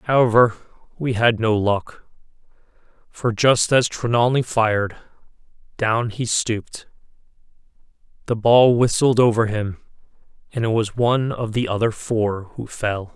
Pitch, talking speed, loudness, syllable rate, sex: 115 Hz, 130 wpm, -19 LUFS, 4.3 syllables/s, male